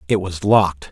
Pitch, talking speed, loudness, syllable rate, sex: 90 Hz, 200 wpm, -17 LUFS, 5.5 syllables/s, male